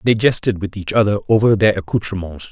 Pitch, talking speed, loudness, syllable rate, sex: 100 Hz, 190 wpm, -17 LUFS, 6.1 syllables/s, male